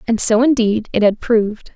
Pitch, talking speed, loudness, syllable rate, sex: 225 Hz, 205 wpm, -16 LUFS, 5.1 syllables/s, female